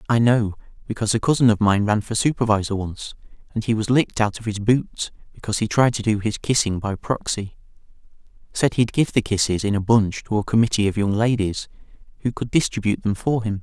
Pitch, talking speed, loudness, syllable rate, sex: 110 Hz, 205 wpm, -21 LUFS, 6.0 syllables/s, male